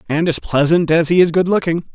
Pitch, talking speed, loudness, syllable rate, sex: 165 Hz, 245 wpm, -15 LUFS, 5.7 syllables/s, male